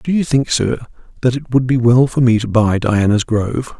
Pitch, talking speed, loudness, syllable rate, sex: 120 Hz, 235 wpm, -15 LUFS, 5.2 syllables/s, male